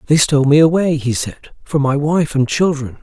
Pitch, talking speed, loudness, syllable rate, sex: 145 Hz, 220 wpm, -15 LUFS, 5.4 syllables/s, male